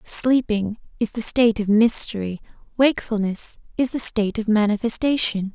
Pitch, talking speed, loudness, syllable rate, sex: 220 Hz, 130 wpm, -20 LUFS, 5.1 syllables/s, female